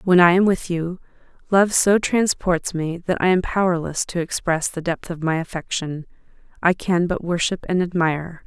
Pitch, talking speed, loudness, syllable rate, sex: 175 Hz, 185 wpm, -20 LUFS, 4.8 syllables/s, female